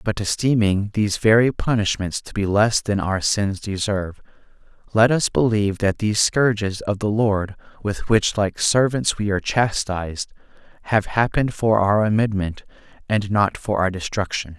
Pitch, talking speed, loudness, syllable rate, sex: 105 Hz, 155 wpm, -20 LUFS, 4.8 syllables/s, male